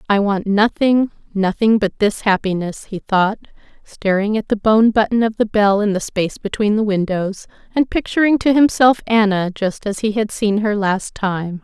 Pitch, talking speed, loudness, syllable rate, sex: 210 Hz, 185 wpm, -17 LUFS, 4.7 syllables/s, female